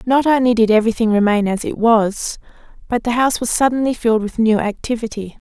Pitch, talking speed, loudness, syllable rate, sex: 230 Hz, 185 wpm, -16 LUFS, 6.0 syllables/s, female